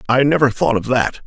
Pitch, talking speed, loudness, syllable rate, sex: 120 Hz, 240 wpm, -16 LUFS, 5.6 syllables/s, male